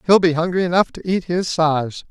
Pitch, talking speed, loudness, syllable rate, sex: 170 Hz, 230 wpm, -18 LUFS, 5.2 syllables/s, male